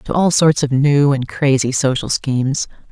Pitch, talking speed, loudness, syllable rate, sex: 140 Hz, 185 wpm, -16 LUFS, 4.5 syllables/s, female